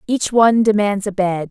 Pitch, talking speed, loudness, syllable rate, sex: 205 Hz, 200 wpm, -16 LUFS, 5.2 syllables/s, female